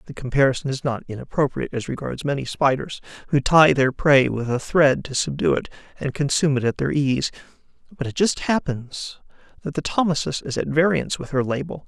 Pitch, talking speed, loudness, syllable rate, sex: 140 Hz, 190 wpm, -21 LUFS, 5.7 syllables/s, male